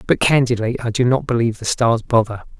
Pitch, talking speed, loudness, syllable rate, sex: 115 Hz, 210 wpm, -18 LUFS, 6.1 syllables/s, male